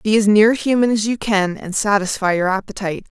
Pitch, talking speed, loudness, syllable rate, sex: 205 Hz, 205 wpm, -17 LUFS, 5.6 syllables/s, female